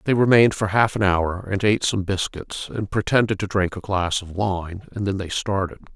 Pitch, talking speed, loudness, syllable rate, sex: 100 Hz, 220 wpm, -22 LUFS, 5.2 syllables/s, male